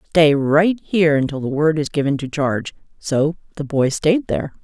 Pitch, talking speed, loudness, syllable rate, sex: 150 Hz, 195 wpm, -18 LUFS, 5.1 syllables/s, female